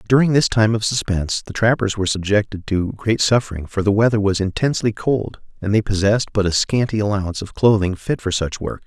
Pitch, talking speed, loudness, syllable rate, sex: 105 Hz, 210 wpm, -19 LUFS, 6.1 syllables/s, male